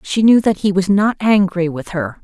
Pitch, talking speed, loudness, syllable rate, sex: 195 Hz, 240 wpm, -15 LUFS, 4.8 syllables/s, female